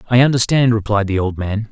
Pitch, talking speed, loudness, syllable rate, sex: 110 Hz, 210 wpm, -16 LUFS, 6.0 syllables/s, male